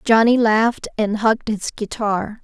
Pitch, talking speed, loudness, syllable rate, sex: 215 Hz, 150 wpm, -18 LUFS, 4.6 syllables/s, female